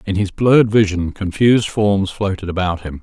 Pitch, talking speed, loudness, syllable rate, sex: 95 Hz, 180 wpm, -16 LUFS, 5.2 syllables/s, male